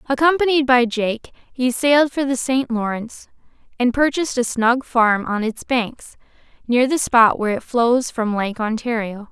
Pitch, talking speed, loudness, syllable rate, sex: 245 Hz, 170 wpm, -18 LUFS, 4.6 syllables/s, female